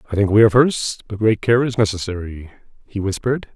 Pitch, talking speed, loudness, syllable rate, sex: 105 Hz, 205 wpm, -18 LUFS, 6.3 syllables/s, male